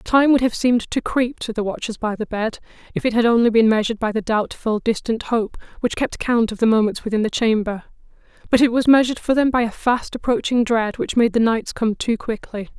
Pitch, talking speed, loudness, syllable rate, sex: 230 Hz, 235 wpm, -19 LUFS, 5.7 syllables/s, female